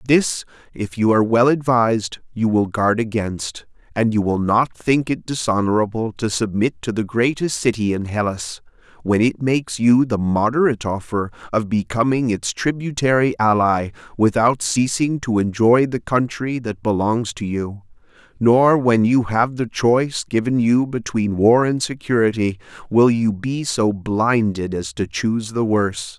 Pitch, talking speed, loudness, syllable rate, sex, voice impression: 115 Hz, 160 wpm, -19 LUFS, 4.5 syllables/s, male, very masculine, slightly old, very thick, tensed, slightly weak, dark, soft, muffled, slightly halting, raspy, cool, intellectual, slightly refreshing, very sincere, very calm, very mature, very friendly, very reassuring, unique, slightly elegant, wild, slightly sweet, slightly lively, kind, modest